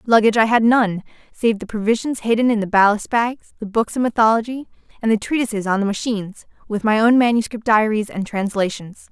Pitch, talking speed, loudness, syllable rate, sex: 220 Hz, 190 wpm, -18 LUFS, 5.8 syllables/s, female